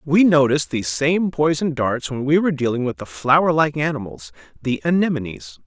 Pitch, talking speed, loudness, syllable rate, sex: 140 Hz, 180 wpm, -19 LUFS, 5.5 syllables/s, male